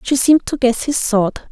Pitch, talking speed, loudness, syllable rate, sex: 255 Hz, 235 wpm, -15 LUFS, 5.3 syllables/s, female